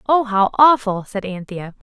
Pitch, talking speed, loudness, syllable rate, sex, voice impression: 220 Hz, 155 wpm, -17 LUFS, 4.5 syllables/s, female, feminine, adult-like, tensed, powerful, bright, clear, fluent, intellectual, calm, friendly, elegant, lively, slightly kind